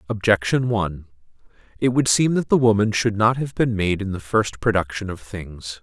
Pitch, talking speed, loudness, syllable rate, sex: 105 Hz, 195 wpm, -20 LUFS, 5.1 syllables/s, male